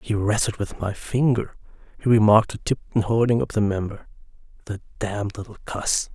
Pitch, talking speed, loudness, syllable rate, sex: 110 Hz, 165 wpm, -22 LUFS, 5.5 syllables/s, male